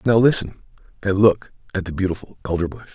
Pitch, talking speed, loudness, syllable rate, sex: 100 Hz, 165 wpm, -21 LUFS, 6.5 syllables/s, male